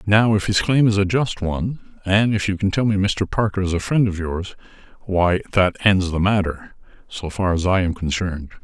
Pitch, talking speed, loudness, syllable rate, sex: 95 Hz, 215 wpm, -20 LUFS, 5.2 syllables/s, male